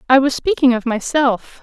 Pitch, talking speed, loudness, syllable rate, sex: 260 Hz, 185 wpm, -16 LUFS, 4.8 syllables/s, female